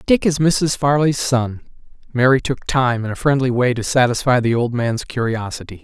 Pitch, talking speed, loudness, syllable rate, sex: 125 Hz, 185 wpm, -18 LUFS, 5.0 syllables/s, male